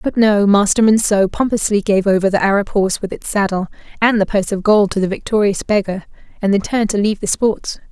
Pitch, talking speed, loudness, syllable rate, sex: 205 Hz, 210 wpm, -16 LUFS, 6.1 syllables/s, female